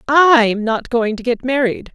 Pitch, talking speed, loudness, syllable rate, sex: 245 Hz, 185 wpm, -15 LUFS, 3.9 syllables/s, female